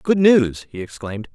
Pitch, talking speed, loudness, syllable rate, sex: 135 Hz, 180 wpm, -17 LUFS, 5.0 syllables/s, male